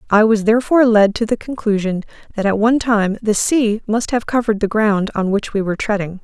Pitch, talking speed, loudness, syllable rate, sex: 215 Hz, 220 wpm, -16 LUFS, 5.9 syllables/s, female